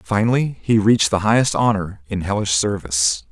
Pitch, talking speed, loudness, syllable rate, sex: 100 Hz, 165 wpm, -18 LUFS, 5.5 syllables/s, male